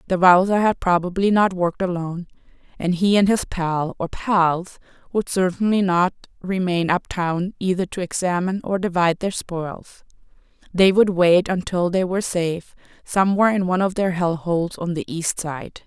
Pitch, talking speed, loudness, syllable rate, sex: 180 Hz, 165 wpm, -20 LUFS, 5.0 syllables/s, female